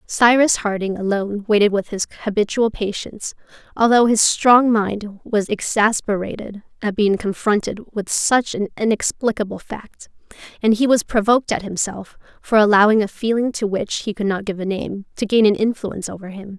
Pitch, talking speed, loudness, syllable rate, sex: 210 Hz, 165 wpm, -18 LUFS, 5.1 syllables/s, female